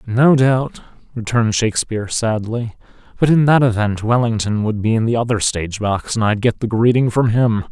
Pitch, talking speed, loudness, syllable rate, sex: 115 Hz, 185 wpm, -17 LUFS, 5.2 syllables/s, male